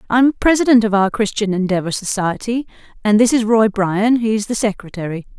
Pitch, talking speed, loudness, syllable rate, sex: 215 Hz, 165 wpm, -16 LUFS, 5.3 syllables/s, female